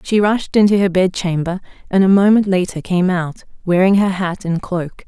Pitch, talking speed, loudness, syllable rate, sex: 185 Hz, 190 wpm, -16 LUFS, 4.9 syllables/s, female